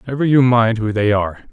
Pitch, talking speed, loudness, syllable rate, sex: 115 Hz, 235 wpm, -15 LUFS, 6.1 syllables/s, male